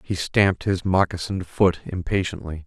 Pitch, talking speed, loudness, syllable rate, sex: 90 Hz, 135 wpm, -22 LUFS, 5.3 syllables/s, male